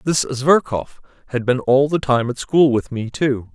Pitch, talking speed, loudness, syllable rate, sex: 130 Hz, 205 wpm, -18 LUFS, 4.4 syllables/s, male